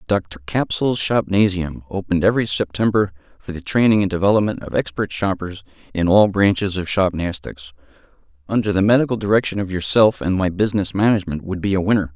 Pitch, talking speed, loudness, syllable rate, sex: 95 Hz, 165 wpm, -19 LUFS, 6.1 syllables/s, male